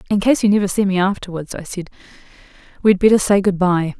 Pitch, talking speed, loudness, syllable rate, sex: 190 Hz, 210 wpm, -17 LUFS, 6.4 syllables/s, female